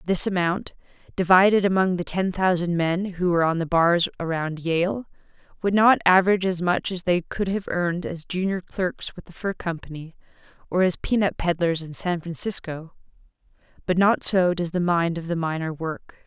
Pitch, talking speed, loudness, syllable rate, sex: 175 Hz, 180 wpm, -23 LUFS, 5.1 syllables/s, female